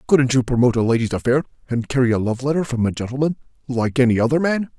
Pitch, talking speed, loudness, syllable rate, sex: 130 Hz, 225 wpm, -19 LUFS, 6.9 syllables/s, male